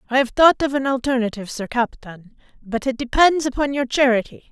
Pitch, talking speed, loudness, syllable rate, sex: 255 Hz, 185 wpm, -19 LUFS, 5.7 syllables/s, female